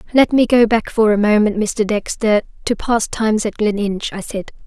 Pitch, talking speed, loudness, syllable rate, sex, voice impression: 215 Hz, 205 wpm, -16 LUFS, 5.0 syllables/s, female, feminine, slightly young, tensed, powerful, bright, slightly soft, clear, intellectual, calm, friendly, slightly reassuring, lively, kind